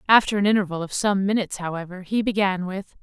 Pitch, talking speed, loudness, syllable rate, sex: 195 Hz, 200 wpm, -23 LUFS, 6.6 syllables/s, female